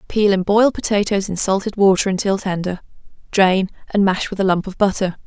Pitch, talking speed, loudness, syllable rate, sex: 195 Hz, 195 wpm, -18 LUFS, 5.5 syllables/s, female